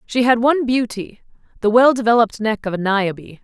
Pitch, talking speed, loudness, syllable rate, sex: 230 Hz, 155 wpm, -17 LUFS, 6.3 syllables/s, female